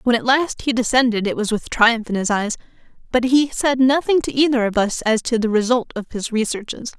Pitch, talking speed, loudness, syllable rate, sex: 240 Hz, 230 wpm, -19 LUFS, 5.5 syllables/s, female